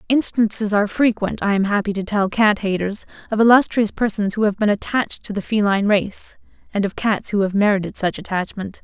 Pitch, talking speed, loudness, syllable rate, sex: 205 Hz, 195 wpm, -19 LUFS, 5.7 syllables/s, female